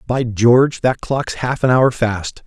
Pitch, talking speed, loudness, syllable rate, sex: 120 Hz, 195 wpm, -16 LUFS, 3.9 syllables/s, male